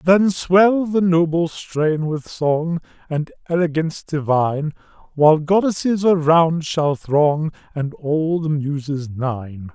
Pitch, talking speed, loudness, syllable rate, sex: 160 Hz, 125 wpm, -19 LUFS, 3.7 syllables/s, male